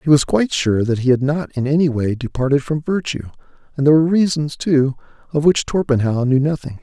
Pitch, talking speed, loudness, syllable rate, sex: 145 Hz, 210 wpm, -17 LUFS, 5.9 syllables/s, male